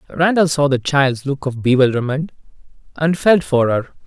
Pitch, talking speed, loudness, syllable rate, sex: 145 Hz, 160 wpm, -16 LUFS, 5.0 syllables/s, male